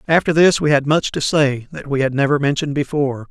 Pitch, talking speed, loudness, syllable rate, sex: 145 Hz, 235 wpm, -17 LUFS, 6.2 syllables/s, male